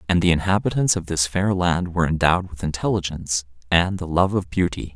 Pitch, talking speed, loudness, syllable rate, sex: 90 Hz, 195 wpm, -21 LUFS, 6.0 syllables/s, male